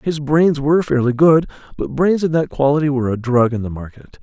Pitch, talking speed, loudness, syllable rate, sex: 145 Hz, 225 wpm, -16 LUFS, 5.8 syllables/s, male